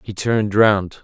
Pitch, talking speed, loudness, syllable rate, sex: 105 Hz, 175 wpm, -17 LUFS, 4.3 syllables/s, male